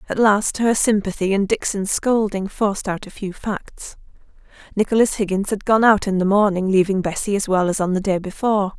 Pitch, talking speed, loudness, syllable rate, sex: 200 Hz, 200 wpm, -19 LUFS, 5.4 syllables/s, female